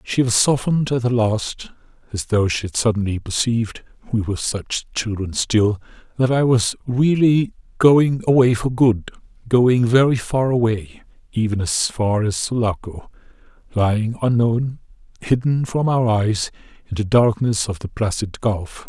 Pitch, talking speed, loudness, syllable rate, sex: 115 Hz, 145 wpm, -19 LUFS, 4.2 syllables/s, male